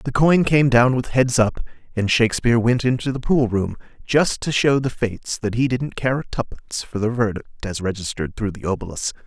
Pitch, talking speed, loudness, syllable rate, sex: 120 Hz, 215 wpm, -20 LUFS, 5.5 syllables/s, male